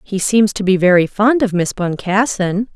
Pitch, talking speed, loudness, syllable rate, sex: 200 Hz, 195 wpm, -15 LUFS, 4.6 syllables/s, female